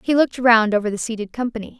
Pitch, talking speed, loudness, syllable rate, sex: 230 Hz, 235 wpm, -19 LUFS, 7.1 syllables/s, female